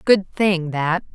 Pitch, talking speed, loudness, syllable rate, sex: 180 Hz, 155 wpm, -20 LUFS, 3.1 syllables/s, female